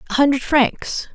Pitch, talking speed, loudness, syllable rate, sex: 275 Hz, 155 wpm, -18 LUFS, 4.4 syllables/s, female